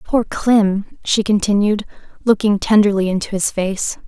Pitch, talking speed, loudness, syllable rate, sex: 205 Hz, 130 wpm, -17 LUFS, 4.3 syllables/s, female